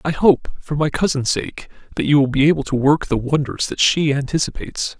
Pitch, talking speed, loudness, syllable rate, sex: 150 Hz, 215 wpm, -18 LUFS, 5.5 syllables/s, male